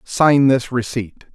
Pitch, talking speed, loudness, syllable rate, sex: 125 Hz, 135 wpm, -17 LUFS, 3.4 syllables/s, male